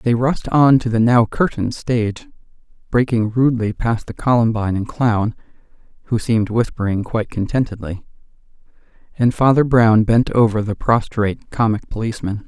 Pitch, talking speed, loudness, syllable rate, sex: 115 Hz, 140 wpm, -17 LUFS, 4.4 syllables/s, male